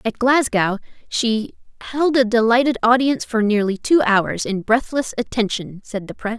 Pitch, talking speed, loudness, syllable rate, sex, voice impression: 230 Hz, 160 wpm, -19 LUFS, 4.8 syllables/s, female, feminine, slightly gender-neutral, young, slightly adult-like, thin, tensed, slightly powerful, bright, hard, clear, fluent, cute, very intellectual, slightly refreshing, very sincere, slightly calm, friendly, slightly reassuring, very unique, slightly elegant, slightly sweet, slightly strict, slightly sharp